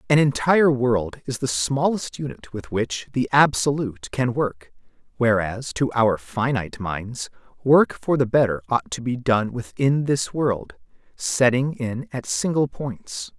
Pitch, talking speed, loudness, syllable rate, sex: 125 Hz, 150 wpm, -22 LUFS, 4.1 syllables/s, male